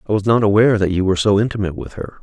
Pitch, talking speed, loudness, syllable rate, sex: 105 Hz, 295 wpm, -16 LUFS, 8.6 syllables/s, male